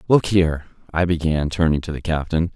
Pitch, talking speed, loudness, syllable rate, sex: 80 Hz, 190 wpm, -20 LUFS, 5.7 syllables/s, male